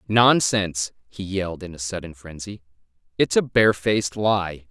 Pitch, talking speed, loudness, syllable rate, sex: 95 Hz, 140 wpm, -22 LUFS, 4.9 syllables/s, male